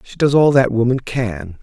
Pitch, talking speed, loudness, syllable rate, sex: 120 Hz, 220 wpm, -16 LUFS, 4.6 syllables/s, male